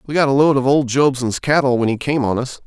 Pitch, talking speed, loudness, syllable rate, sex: 135 Hz, 290 wpm, -17 LUFS, 6.1 syllables/s, male